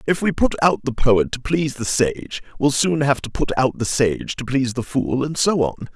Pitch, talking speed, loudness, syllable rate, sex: 130 Hz, 250 wpm, -20 LUFS, 4.9 syllables/s, male